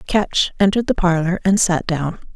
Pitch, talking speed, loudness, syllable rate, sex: 180 Hz, 180 wpm, -18 LUFS, 5.0 syllables/s, female